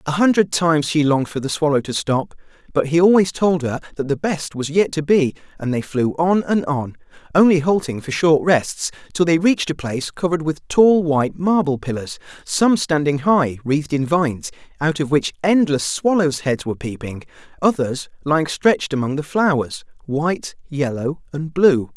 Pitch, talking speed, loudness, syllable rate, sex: 155 Hz, 185 wpm, -19 LUFS, 5.1 syllables/s, male